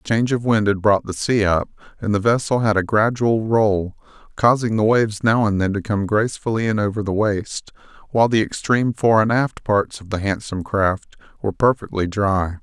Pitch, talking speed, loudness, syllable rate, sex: 105 Hz, 205 wpm, -19 LUFS, 5.4 syllables/s, male